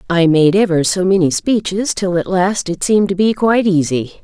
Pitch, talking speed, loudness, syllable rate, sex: 185 Hz, 215 wpm, -14 LUFS, 5.3 syllables/s, female